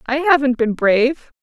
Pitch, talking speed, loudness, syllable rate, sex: 265 Hz, 170 wpm, -16 LUFS, 5.0 syllables/s, female